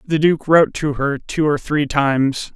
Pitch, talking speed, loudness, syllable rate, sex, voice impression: 145 Hz, 210 wpm, -17 LUFS, 4.5 syllables/s, male, masculine, middle-aged, thick, slightly powerful, bright, soft, slightly muffled, intellectual, calm, friendly, reassuring, wild, kind